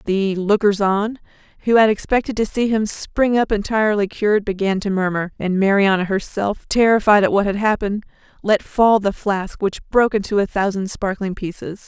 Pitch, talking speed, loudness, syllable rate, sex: 205 Hz, 175 wpm, -18 LUFS, 5.2 syllables/s, female